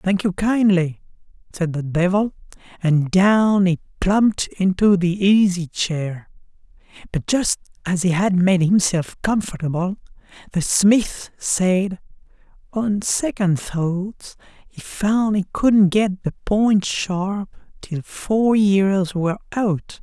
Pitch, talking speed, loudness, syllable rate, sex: 190 Hz, 125 wpm, -19 LUFS, 3.4 syllables/s, male